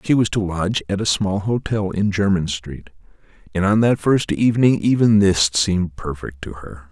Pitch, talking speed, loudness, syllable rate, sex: 95 Hz, 190 wpm, -19 LUFS, 5.0 syllables/s, male